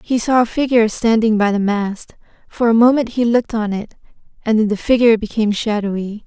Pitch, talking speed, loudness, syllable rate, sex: 220 Hz, 200 wpm, -16 LUFS, 5.9 syllables/s, female